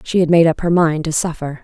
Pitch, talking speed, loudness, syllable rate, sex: 165 Hz, 295 wpm, -15 LUFS, 5.9 syllables/s, female